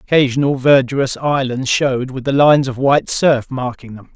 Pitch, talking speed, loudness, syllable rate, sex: 135 Hz, 175 wpm, -15 LUFS, 5.4 syllables/s, male